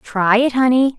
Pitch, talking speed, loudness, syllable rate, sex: 240 Hz, 180 wpm, -15 LUFS, 4.7 syllables/s, female